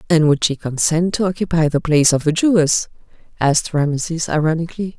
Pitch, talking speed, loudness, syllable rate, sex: 160 Hz, 170 wpm, -17 LUFS, 6.1 syllables/s, female